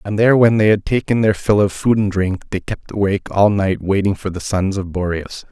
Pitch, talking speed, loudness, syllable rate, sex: 100 Hz, 250 wpm, -17 LUFS, 5.5 syllables/s, male